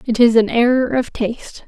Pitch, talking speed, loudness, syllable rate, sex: 235 Hz, 215 wpm, -16 LUFS, 5.2 syllables/s, female